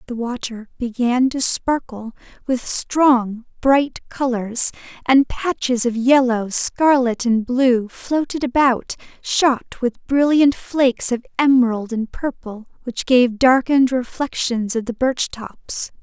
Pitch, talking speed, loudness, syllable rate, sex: 250 Hz, 125 wpm, -18 LUFS, 3.7 syllables/s, female